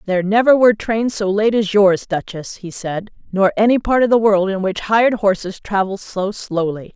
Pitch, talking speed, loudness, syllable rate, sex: 205 Hz, 205 wpm, -17 LUFS, 5.1 syllables/s, female